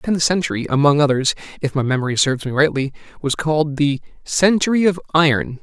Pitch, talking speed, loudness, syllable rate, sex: 150 Hz, 180 wpm, -18 LUFS, 6.2 syllables/s, male